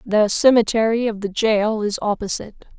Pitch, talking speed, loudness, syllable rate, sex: 215 Hz, 150 wpm, -19 LUFS, 5.1 syllables/s, female